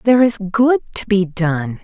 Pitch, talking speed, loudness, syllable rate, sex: 205 Hz, 195 wpm, -16 LUFS, 4.5 syllables/s, female